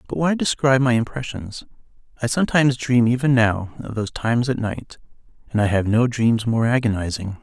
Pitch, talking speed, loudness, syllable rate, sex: 120 Hz, 180 wpm, -20 LUFS, 5.7 syllables/s, male